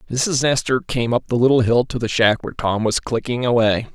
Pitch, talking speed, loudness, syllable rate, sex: 120 Hz, 230 wpm, -19 LUFS, 5.7 syllables/s, male